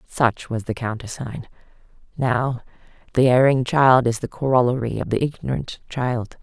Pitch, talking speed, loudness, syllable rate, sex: 125 Hz, 140 wpm, -21 LUFS, 4.6 syllables/s, female